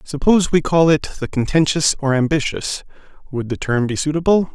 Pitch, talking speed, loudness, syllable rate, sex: 150 Hz, 160 wpm, -18 LUFS, 5.5 syllables/s, male